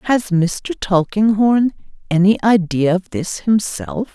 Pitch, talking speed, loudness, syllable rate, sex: 200 Hz, 115 wpm, -17 LUFS, 3.7 syllables/s, female